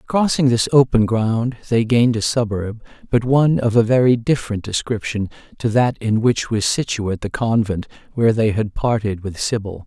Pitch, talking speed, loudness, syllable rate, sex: 115 Hz, 175 wpm, -18 LUFS, 5.2 syllables/s, male